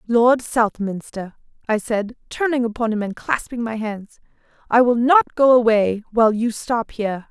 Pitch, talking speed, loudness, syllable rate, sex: 230 Hz, 165 wpm, -19 LUFS, 4.6 syllables/s, female